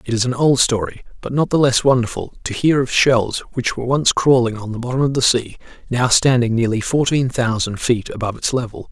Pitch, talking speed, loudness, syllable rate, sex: 125 Hz, 220 wpm, -17 LUFS, 5.6 syllables/s, male